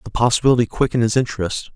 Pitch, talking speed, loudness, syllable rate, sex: 120 Hz, 170 wpm, -18 LUFS, 8.0 syllables/s, male